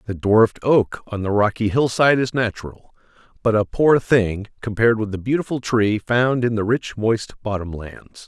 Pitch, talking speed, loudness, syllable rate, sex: 110 Hz, 180 wpm, -19 LUFS, 4.9 syllables/s, male